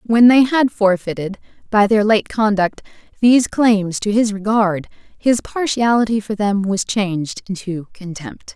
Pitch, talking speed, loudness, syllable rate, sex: 210 Hz, 145 wpm, -17 LUFS, 4.3 syllables/s, female